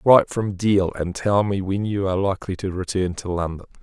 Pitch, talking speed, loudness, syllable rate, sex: 95 Hz, 220 wpm, -22 LUFS, 5.6 syllables/s, male